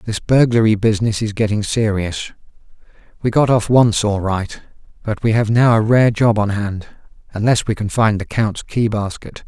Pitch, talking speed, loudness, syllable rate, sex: 110 Hz, 175 wpm, -17 LUFS, 4.8 syllables/s, male